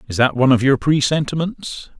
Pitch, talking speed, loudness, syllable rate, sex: 140 Hz, 180 wpm, -17 LUFS, 5.7 syllables/s, male